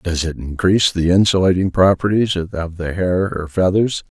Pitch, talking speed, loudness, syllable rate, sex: 90 Hz, 155 wpm, -17 LUFS, 4.8 syllables/s, male